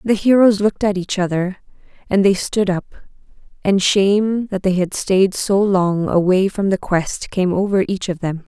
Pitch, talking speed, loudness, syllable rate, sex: 195 Hz, 190 wpm, -17 LUFS, 4.5 syllables/s, female